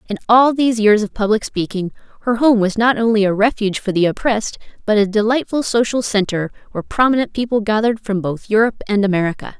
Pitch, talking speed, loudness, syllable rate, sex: 215 Hz, 195 wpm, -17 LUFS, 6.4 syllables/s, female